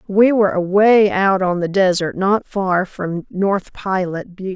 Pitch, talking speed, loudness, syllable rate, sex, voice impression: 190 Hz, 170 wpm, -17 LUFS, 5.0 syllables/s, female, feminine, adult-like, tensed, powerful, clear, fluent, calm, elegant, lively, sharp